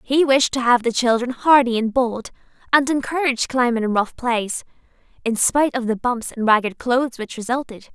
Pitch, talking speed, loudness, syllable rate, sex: 245 Hz, 190 wpm, -19 LUFS, 5.3 syllables/s, female